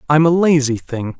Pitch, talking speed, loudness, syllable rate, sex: 145 Hz, 200 wpm, -15 LUFS, 5.0 syllables/s, male